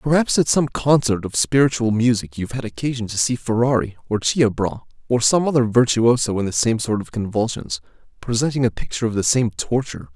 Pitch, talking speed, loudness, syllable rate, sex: 115 Hz, 190 wpm, -19 LUFS, 5.9 syllables/s, male